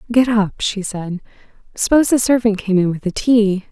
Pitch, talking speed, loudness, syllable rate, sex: 215 Hz, 195 wpm, -16 LUFS, 5.3 syllables/s, female